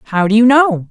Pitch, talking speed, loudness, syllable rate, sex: 225 Hz, 265 wpm, -11 LUFS, 6.0 syllables/s, female